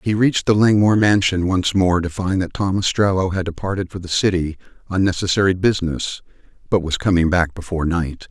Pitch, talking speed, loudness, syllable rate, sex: 90 Hz, 190 wpm, -18 LUFS, 5.8 syllables/s, male